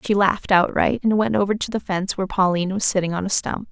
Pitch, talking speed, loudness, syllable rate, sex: 195 Hz, 260 wpm, -20 LUFS, 6.7 syllables/s, female